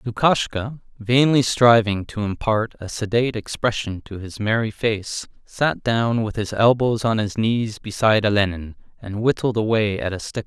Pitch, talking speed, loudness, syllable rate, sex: 110 Hz, 160 wpm, -21 LUFS, 4.6 syllables/s, male